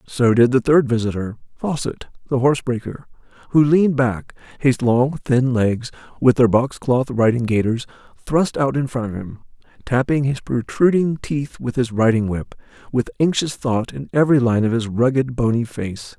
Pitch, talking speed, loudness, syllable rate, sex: 125 Hz, 170 wpm, -19 LUFS, 4.8 syllables/s, male